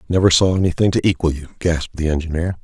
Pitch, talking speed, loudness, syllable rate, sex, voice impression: 85 Hz, 205 wpm, -18 LUFS, 6.9 syllables/s, male, very masculine, very adult-like, very middle-aged, very thick, tensed, very powerful, bright, soft, muffled, fluent, slightly raspy, very cool, intellectual, slightly refreshing, sincere, calm, very mature, very friendly, very reassuring, very unique, slightly elegant, very wild, sweet, slightly lively, kind